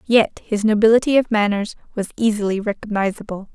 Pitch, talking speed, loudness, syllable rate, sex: 215 Hz, 135 wpm, -19 LUFS, 5.8 syllables/s, female